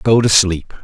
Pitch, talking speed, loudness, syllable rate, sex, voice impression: 100 Hz, 215 wpm, -13 LUFS, 3.9 syllables/s, male, very masculine, slightly young, slightly adult-like, slightly thick, relaxed, weak, slightly dark, soft, slightly muffled, slightly raspy, slightly cool, intellectual, slightly refreshing, very sincere, very calm, slightly mature, friendly, reassuring, unique, elegant, sweet, slightly lively, very kind, modest